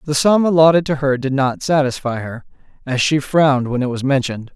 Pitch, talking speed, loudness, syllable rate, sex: 140 Hz, 210 wpm, -16 LUFS, 5.7 syllables/s, male